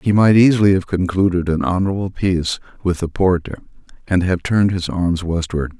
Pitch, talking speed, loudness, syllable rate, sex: 90 Hz, 175 wpm, -17 LUFS, 5.6 syllables/s, male